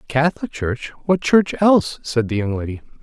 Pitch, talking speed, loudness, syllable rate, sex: 135 Hz, 200 wpm, -19 LUFS, 5.8 syllables/s, male